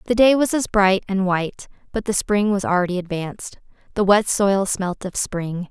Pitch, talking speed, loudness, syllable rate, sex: 195 Hz, 200 wpm, -20 LUFS, 4.9 syllables/s, female